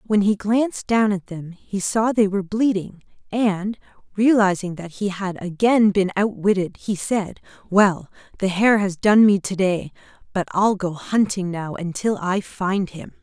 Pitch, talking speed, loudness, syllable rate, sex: 195 Hz, 170 wpm, -21 LUFS, 4.3 syllables/s, female